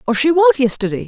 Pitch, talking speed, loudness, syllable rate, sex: 275 Hz, 225 wpm, -14 LUFS, 6.5 syllables/s, female